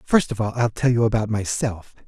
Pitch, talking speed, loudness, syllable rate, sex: 115 Hz, 230 wpm, -22 LUFS, 5.3 syllables/s, male